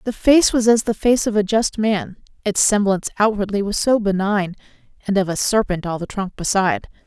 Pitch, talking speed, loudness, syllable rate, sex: 205 Hz, 205 wpm, -18 LUFS, 5.4 syllables/s, female